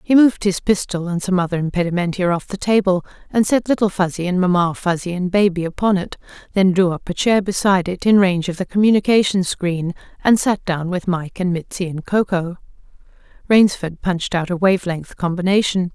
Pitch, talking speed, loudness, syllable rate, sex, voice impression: 185 Hz, 190 wpm, -18 LUFS, 5.7 syllables/s, female, feminine, adult-like, tensed, powerful, soft, raspy, intellectual, elegant, lively, slightly sharp